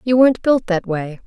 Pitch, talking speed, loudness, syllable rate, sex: 215 Hz, 235 wpm, -17 LUFS, 5.3 syllables/s, female